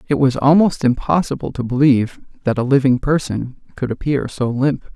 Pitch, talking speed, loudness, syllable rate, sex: 135 Hz, 170 wpm, -17 LUFS, 5.2 syllables/s, male